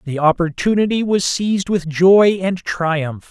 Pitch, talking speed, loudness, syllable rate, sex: 180 Hz, 145 wpm, -16 LUFS, 4.1 syllables/s, male